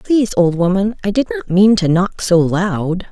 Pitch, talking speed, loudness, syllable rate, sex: 190 Hz, 210 wpm, -15 LUFS, 4.7 syllables/s, female